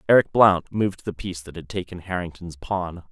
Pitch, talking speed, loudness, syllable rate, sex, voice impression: 90 Hz, 190 wpm, -23 LUFS, 5.6 syllables/s, male, masculine, adult-like, tensed, bright, clear, fluent, refreshing, friendly, lively, kind, light